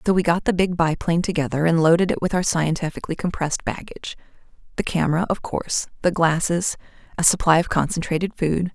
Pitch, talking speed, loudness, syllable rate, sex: 170 Hz, 180 wpm, -21 LUFS, 6.4 syllables/s, female